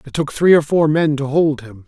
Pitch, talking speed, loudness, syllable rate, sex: 150 Hz, 290 wpm, -16 LUFS, 5.1 syllables/s, male